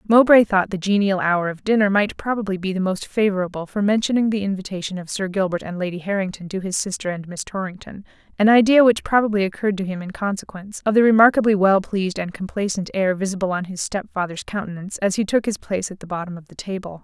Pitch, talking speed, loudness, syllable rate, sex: 195 Hz, 220 wpm, -20 LUFS, 6.4 syllables/s, female